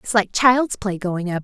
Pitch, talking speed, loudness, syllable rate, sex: 205 Hz, 250 wpm, -19 LUFS, 4.4 syllables/s, female